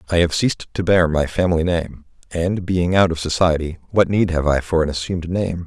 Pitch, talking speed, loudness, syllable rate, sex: 85 Hz, 225 wpm, -19 LUFS, 5.6 syllables/s, male